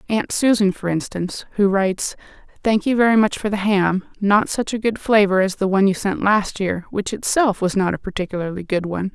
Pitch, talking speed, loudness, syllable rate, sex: 200 Hz, 215 wpm, -19 LUFS, 5.6 syllables/s, female